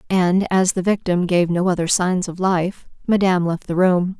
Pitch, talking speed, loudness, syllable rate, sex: 180 Hz, 200 wpm, -19 LUFS, 4.8 syllables/s, female